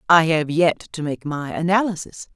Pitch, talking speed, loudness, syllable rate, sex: 165 Hz, 180 wpm, -20 LUFS, 4.8 syllables/s, female